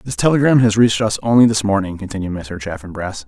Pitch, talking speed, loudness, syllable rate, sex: 105 Hz, 200 wpm, -16 LUFS, 6.3 syllables/s, male